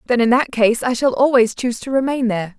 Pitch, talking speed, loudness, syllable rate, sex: 240 Hz, 255 wpm, -17 LUFS, 6.2 syllables/s, female